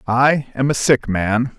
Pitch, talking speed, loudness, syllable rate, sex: 125 Hz, 190 wpm, -17 LUFS, 3.7 syllables/s, male